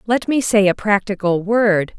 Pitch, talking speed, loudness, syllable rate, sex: 205 Hz, 180 wpm, -17 LUFS, 4.3 syllables/s, female